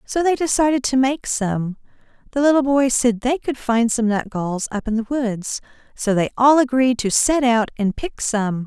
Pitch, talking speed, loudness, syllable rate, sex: 240 Hz, 200 wpm, -19 LUFS, 4.6 syllables/s, female